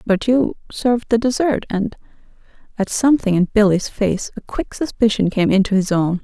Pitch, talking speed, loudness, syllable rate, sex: 215 Hz, 165 wpm, -18 LUFS, 5.2 syllables/s, female